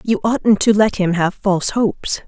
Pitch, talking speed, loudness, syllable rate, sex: 205 Hz, 210 wpm, -16 LUFS, 4.7 syllables/s, female